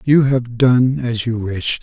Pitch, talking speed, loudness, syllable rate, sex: 120 Hz, 200 wpm, -16 LUFS, 3.5 syllables/s, male